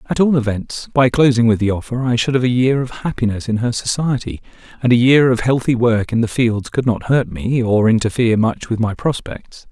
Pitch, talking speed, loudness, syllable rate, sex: 120 Hz, 230 wpm, -16 LUFS, 5.4 syllables/s, male